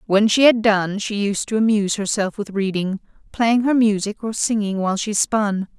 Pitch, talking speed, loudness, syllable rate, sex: 210 Hz, 195 wpm, -19 LUFS, 4.9 syllables/s, female